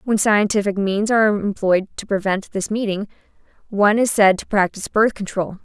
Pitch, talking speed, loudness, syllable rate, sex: 205 Hz, 170 wpm, -19 LUFS, 5.4 syllables/s, female